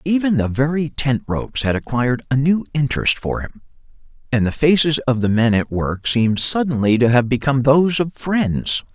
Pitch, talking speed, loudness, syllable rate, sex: 135 Hz, 190 wpm, -18 LUFS, 5.3 syllables/s, male